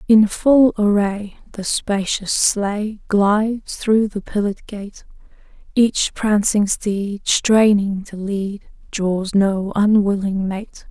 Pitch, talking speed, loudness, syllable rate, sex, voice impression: 205 Hz, 115 wpm, -18 LUFS, 3.2 syllables/s, female, feminine, adult-like, relaxed, slightly weak, soft, slightly halting, raspy, calm, slightly reassuring, kind, modest